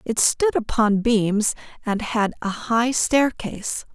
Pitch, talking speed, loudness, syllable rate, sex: 225 Hz, 135 wpm, -21 LUFS, 3.5 syllables/s, female